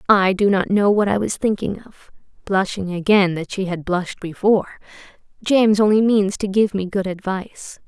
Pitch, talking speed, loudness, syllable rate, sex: 195 Hz, 185 wpm, -19 LUFS, 3.8 syllables/s, female